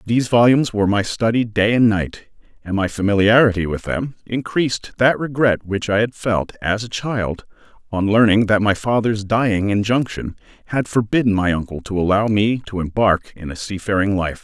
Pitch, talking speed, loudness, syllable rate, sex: 105 Hz, 180 wpm, -18 LUFS, 5.2 syllables/s, male